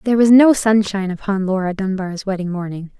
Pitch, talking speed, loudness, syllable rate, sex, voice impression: 200 Hz, 180 wpm, -17 LUFS, 6.0 syllables/s, female, very feminine, young, very thin, tensed, slightly weak, very bright, slightly soft, very clear, very fluent, slightly raspy, very cute, intellectual, very refreshing, sincere, slightly calm, very friendly, very reassuring, very unique, elegant, slightly wild, sweet, very lively, slightly kind, slightly intense, slightly sharp, slightly modest, very light